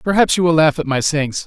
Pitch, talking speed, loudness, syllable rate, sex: 160 Hz, 330 wpm, -16 LUFS, 6.3 syllables/s, male